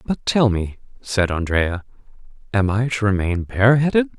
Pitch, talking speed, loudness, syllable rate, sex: 110 Hz, 145 wpm, -19 LUFS, 4.8 syllables/s, male